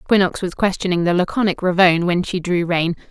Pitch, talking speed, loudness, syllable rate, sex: 180 Hz, 195 wpm, -18 LUFS, 6.1 syllables/s, female